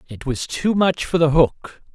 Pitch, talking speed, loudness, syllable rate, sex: 155 Hz, 215 wpm, -19 LUFS, 4.1 syllables/s, male